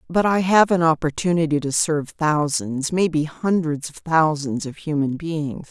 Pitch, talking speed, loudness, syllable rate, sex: 155 Hz, 145 wpm, -21 LUFS, 4.5 syllables/s, female